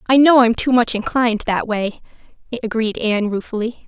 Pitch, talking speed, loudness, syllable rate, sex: 235 Hz, 170 wpm, -17 LUFS, 5.6 syllables/s, female